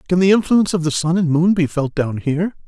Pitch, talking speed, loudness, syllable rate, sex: 170 Hz, 270 wpm, -17 LUFS, 6.2 syllables/s, male